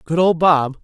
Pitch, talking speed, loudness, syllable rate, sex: 160 Hz, 215 wpm, -15 LUFS, 4.3 syllables/s, male